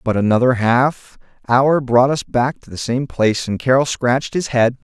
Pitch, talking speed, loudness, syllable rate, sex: 125 Hz, 195 wpm, -17 LUFS, 4.8 syllables/s, male